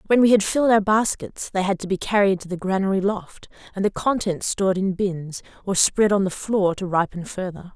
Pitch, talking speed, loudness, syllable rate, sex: 195 Hz, 225 wpm, -21 LUFS, 5.4 syllables/s, female